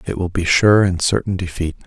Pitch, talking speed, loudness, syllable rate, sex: 90 Hz, 225 wpm, -17 LUFS, 5.3 syllables/s, male